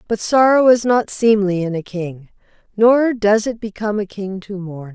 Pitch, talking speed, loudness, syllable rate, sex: 205 Hz, 195 wpm, -17 LUFS, 4.6 syllables/s, female